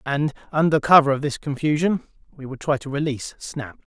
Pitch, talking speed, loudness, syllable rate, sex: 145 Hz, 180 wpm, -21 LUFS, 5.6 syllables/s, male